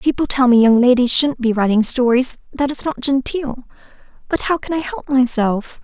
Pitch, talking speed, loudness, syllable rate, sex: 255 Hz, 195 wpm, -16 LUFS, 5.0 syllables/s, female